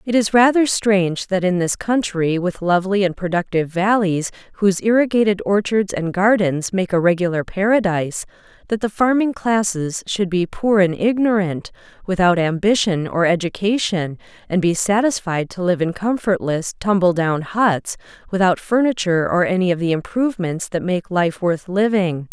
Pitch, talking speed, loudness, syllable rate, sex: 190 Hz, 155 wpm, -18 LUFS, 5.0 syllables/s, female